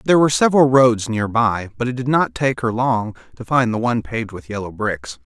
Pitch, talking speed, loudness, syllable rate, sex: 120 Hz, 225 wpm, -18 LUFS, 5.8 syllables/s, male